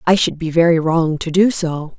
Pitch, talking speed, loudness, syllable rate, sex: 165 Hz, 240 wpm, -16 LUFS, 4.8 syllables/s, female